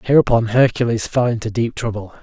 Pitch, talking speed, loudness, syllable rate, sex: 115 Hz, 160 wpm, -18 LUFS, 5.8 syllables/s, male